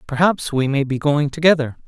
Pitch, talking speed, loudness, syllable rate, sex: 145 Hz, 190 wpm, -18 LUFS, 5.4 syllables/s, male